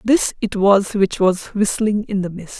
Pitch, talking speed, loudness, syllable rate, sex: 200 Hz, 210 wpm, -18 LUFS, 4.1 syllables/s, female